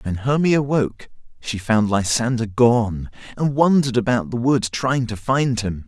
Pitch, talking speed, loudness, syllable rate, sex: 120 Hz, 165 wpm, -19 LUFS, 4.2 syllables/s, male